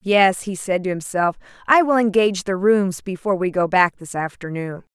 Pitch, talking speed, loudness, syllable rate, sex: 190 Hz, 195 wpm, -19 LUFS, 5.1 syllables/s, female